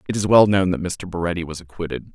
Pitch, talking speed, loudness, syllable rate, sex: 90 Hz, 250 wpm, -20 LUFS, 6.5 syllables/s, male